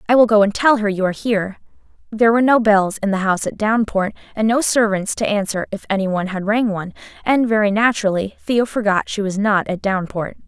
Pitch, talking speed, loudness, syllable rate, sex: 210 Hz, 225 wpm, -18 LUFS, 6.2 syllables/s, female